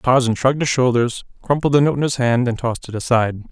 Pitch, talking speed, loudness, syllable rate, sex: 125 Hz, 240 wpm, -18 LUFS, 6.4 syllables/s, male